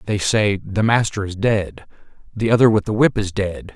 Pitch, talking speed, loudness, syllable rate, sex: 105 Hz, 210 wpm, -18 LUFS, 4.7 syllables/s, male